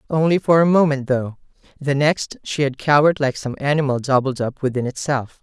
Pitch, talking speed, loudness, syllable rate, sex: 140 Hz, 190 wpm, -19 LUFS, 5.5 syllables/s, male